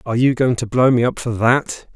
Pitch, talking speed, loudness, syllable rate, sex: 120 Hz, 275 wpm, -17 LUFS, 5.6 syllables/s, male